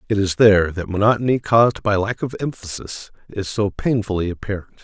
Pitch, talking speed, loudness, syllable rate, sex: 105 Hz, 175 wpm, -19 LUFS, 5.8 syllables/s, male